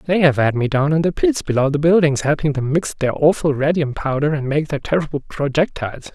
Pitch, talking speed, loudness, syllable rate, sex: 145 Hz, 225 wpm, -18 LUFS, 5.9 syllables/s, male